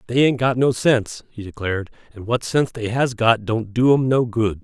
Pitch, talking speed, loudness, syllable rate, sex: 115 Hz, 235 wpm, -19 LUFS, 5.3 syllables/s, male